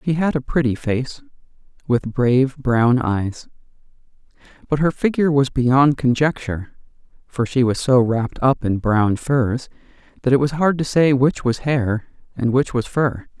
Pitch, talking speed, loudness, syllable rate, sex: 130 Hz, 165 wpm, -19 LUFS, 4.5 syllables/s, male